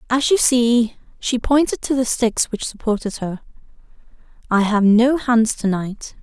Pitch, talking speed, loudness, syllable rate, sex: 235 Hz, 145 wpm, -18 LUFS, 4.3 syllables/s, female